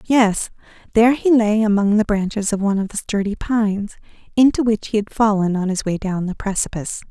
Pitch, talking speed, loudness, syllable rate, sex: 210 Hz, 205 wpm, -19 LUFS, 5.8 syllables/s, female